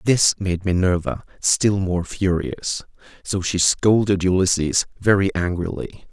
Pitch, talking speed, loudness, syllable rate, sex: 90 Hz, 120 wpm, -20 LUFS, 4.0 syllables/s, male